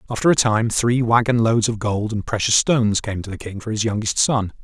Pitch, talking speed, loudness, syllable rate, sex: 110 Hz, 245 wpm, -19 LUFS, 5.5 syllables/s, male